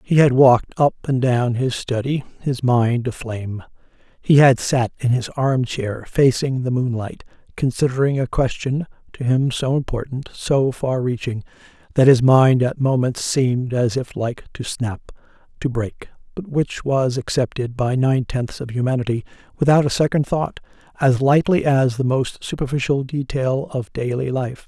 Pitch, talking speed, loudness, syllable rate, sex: 130 Hz, 165 wpm, -19 LUFS, 4.5 syllables/s, male